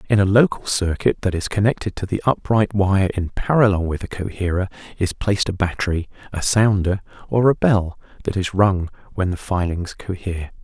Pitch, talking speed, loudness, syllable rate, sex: 95 Hz, 180 wpm, -20 LUFS, 5.4 syllables/s, male